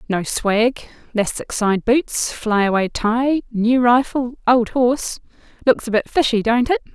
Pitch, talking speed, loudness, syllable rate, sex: 235 Hz, 145 wpm, -18 LUFS, 4.0 syllables/s, female